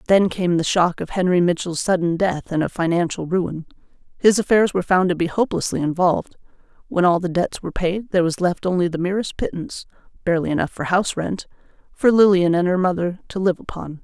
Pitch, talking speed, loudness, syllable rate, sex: 180 Hz, 190 wpm, -20 LUFS, 6.1 syllables/s, female